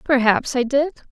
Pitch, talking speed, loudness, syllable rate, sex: 265 Hz, 160 wpm, -19 LUFS, 4.7 syllables/s, female